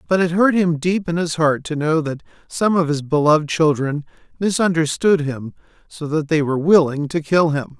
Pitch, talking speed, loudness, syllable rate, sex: 160 Hz, 200 wpm, -18 LUFS, 5.2 syllables/s, male